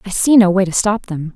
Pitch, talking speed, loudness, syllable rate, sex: 195 Hz, 310 wpm, -14 LUFS, 5.8 syllables/s, female